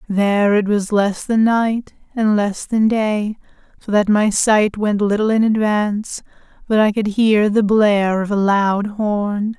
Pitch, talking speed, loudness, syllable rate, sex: 210 Hz, 175 wpm, -17 LUFS, 4.0 syllables/s, female